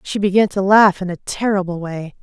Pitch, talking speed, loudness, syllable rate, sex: 190 Hz, 215 wpm, -16 LUFS, 5.3 syllables/s, female